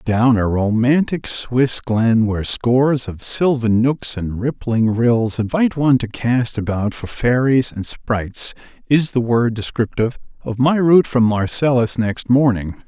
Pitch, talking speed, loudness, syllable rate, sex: 120 Hz, 155 wpm, -17 LUFS, 4.3 syllables/s, male